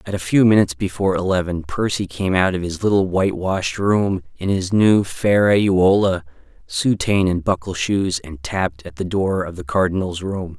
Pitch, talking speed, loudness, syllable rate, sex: 95 Hz, 180 wpm, -19 LUFS, 4.9 syllables/s, male